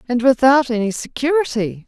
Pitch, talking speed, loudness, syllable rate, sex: 240 Hz, 130 wpm, -17 LUFS, 5.3 syllables/s, female